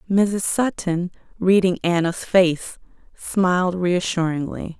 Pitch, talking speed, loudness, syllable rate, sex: 180 Hz, 90 wpm, -20 LUFS, 3.8 syllables/s, female